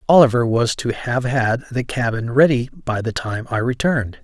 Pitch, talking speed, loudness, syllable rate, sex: 125 Hz, 185 wpm, -19 LUFS, 4.9 syllables/s, male